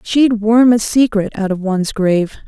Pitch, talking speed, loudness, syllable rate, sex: 215 Hz, 195 wpm, -14 LUFS, 4.8 syllables/s, female